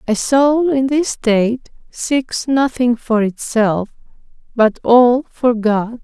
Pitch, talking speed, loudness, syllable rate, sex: 245 Hz, 130 wpm, -15 LUFS, 3.2 syllables/s, female